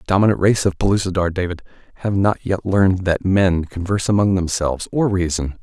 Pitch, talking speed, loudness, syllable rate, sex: 95 Hz, 180 wpm, -18 LUFS, 5.9 syllables/s, male